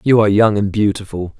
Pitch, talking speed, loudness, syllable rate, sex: 105 Hz, 215 wpm, -15 LUFS, 6.2 syllables/s, male